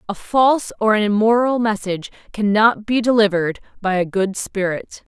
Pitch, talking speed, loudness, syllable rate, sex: 210 Hz, 150 wpm, -18 LUFS, 5.2 syllables/s, female